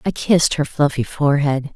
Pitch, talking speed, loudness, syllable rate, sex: 145 Hz, 170 wpm, -18 LUFS, 5.5 syllables/s, female